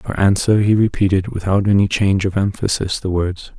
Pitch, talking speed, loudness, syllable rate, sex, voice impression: 95 Hz, 185 wpm, -17 LUFS, 5.4 syllables/s, male, masculine, adult-like, slightly weak, slightly soft, slightly raspy, very calm, reassuring, kind